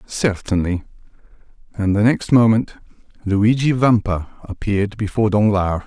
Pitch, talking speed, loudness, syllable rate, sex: 105 Hz, 100 wpm, -18 LUFS, 4.6 syllables/s, male